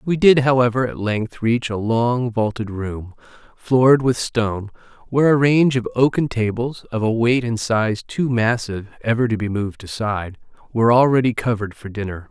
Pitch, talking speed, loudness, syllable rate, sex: 115 Hz, 175 wpm, -19 LUFS, 5.2 syllables/s, male